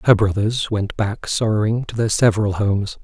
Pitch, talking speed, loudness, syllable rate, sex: 105 Hz, 180 wpm, -19 LUFS, 5.2 syllables/s, male